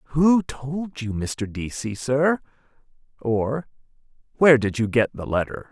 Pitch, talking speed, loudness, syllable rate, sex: 130 Hz, 135 wpm, -23 LUFS, 4.1 syllables/s, male